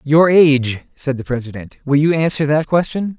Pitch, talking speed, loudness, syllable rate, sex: 145 Hz, 190 wpm, -16 LUFS, 5.2 syllables/s, male